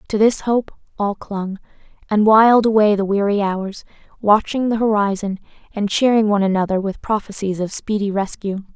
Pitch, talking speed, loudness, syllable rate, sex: 205 Hz, 160 wpm, -18 LUFS, 5.3 syllables/s, female